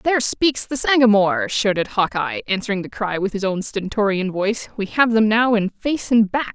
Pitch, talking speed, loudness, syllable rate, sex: 210 Hz, 200 wpm, -19 LUFS, 5.2 syllables/s, female